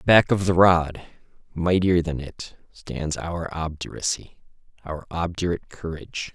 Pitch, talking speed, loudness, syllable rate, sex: 85 Hz, 115 wpm, -24 LUFS, 4.1 syllables/s, male